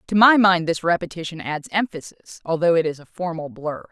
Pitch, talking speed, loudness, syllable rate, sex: 170 Hz, 200 wpm, -21 LUFS, 5.4 syllables/s, female